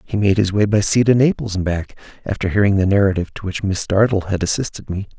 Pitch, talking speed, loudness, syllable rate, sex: 100 Hz, 245 wpm, -18 LUFS, 6.4 syllables/s, male